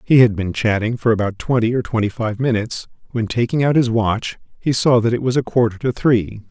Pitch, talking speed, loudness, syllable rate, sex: 115 Hz, 230 wpm, -18 LUFS, 5.6 syllables/s, male